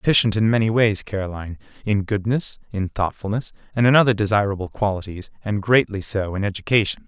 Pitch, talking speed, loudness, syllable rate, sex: 105 Hz, 160 wpm, -21 LUFS, 6.0 syllables/s, male